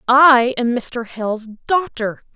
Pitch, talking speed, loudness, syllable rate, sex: 245 Hz, 125 wpm, -17 LUFS, 3.4 syllables/s, female